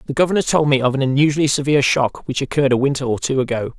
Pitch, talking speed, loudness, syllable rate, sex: 140 Hz, 255 wpm, -17 LUFS, 7.4 syllables/s, male